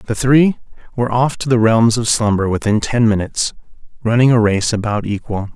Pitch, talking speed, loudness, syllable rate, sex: 115 Hz, 185 wpm, -15 LUFS, 5.4 syllables/s, male